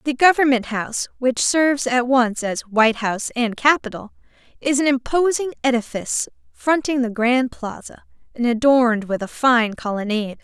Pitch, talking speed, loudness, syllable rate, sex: 250 Hz, 150 wpm, -19 LUFS, 5.1 syllables/s, female